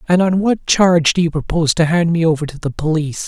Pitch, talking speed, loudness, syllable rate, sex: 165 Hz, 255 wpm, -15 LUFS, 6.3 syllables/s, male